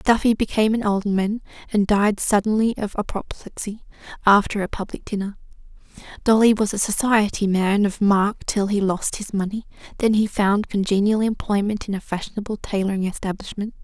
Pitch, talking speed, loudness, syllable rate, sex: 205 Hz, 150 wpm, -21 LUFS, 5.4 syllables/s, female